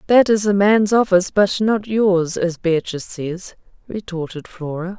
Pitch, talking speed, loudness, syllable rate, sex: 190 Hz, 155 wpm, -18 LUFS, 4.4 syllables/s, female